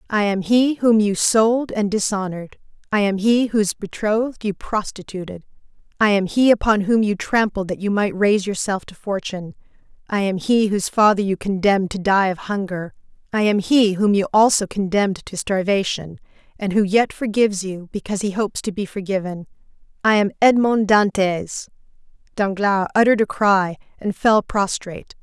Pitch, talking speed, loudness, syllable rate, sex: 200 Hz, 155 wpm, -19 LUFS, 5.2 syllables/s, female